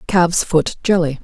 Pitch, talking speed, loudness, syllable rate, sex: 170 Hz, 145 wpm, -16 LUFS, 3.9 syllables/s, female